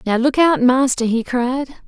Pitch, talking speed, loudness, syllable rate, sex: 255 Hz, 190 wpm, -17 LUFS, 4.3 syllables/s, female